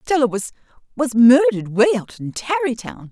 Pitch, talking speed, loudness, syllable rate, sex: 230 Hz, 135 wpm, -17 LUFS, 5.4 syllables/s, female